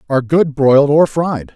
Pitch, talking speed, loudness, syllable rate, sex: 145 Hz, 195 wpm, -13 LUFS, 5.2 syllables/s, male